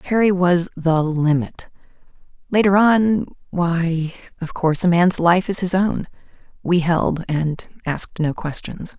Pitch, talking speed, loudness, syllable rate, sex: 175 Hz, 140 wpm, -19 LUFS, 5.0 syllables/s, female